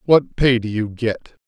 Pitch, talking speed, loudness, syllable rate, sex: 120 Hz, 205 wpm, -19 LUFS, 4.1 syllables/s, male